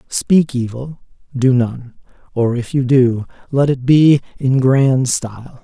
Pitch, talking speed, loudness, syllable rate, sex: 130 Hz, 150 wpm, -15 LUFS, 3.6 syllables/s, male